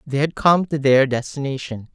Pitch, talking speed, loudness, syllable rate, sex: 140 Hz, 185 wpm, -19 LUFS, 5.0 syllables/s, male